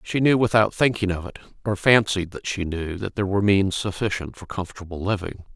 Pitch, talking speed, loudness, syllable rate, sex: 100 Hz, 195 wpm, -23 LUFS, 5.9 syllables/s, male